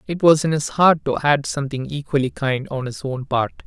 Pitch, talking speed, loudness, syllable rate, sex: 140 Hz, 230 wpm, -20 LUFS, 5.3 syllables/s, male